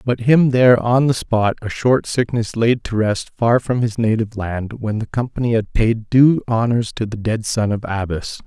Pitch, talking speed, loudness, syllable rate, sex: 115 Hz, 215 wpm, -18 LUFS, 4.7 syllables/s, male